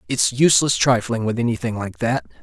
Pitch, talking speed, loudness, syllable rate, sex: 120 Hz, 175 wpm, -19 LUFS, 5.7 syllables/s, male